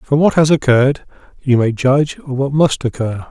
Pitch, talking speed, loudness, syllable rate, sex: 135 Hz, 200 wpm, -15 LUFS, 5.2 syllables/s, male